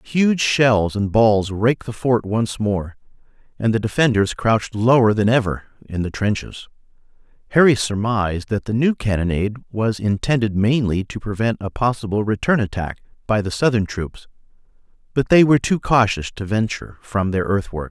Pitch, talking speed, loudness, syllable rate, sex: 110 Hz, 160 wpm, -19 LUFS, 5.0 syllables/s, male